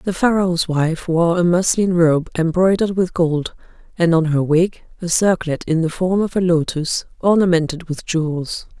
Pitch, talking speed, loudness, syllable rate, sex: 170 Hz, 170 wpm, -18 LUFS, 4.6 syllables/s, female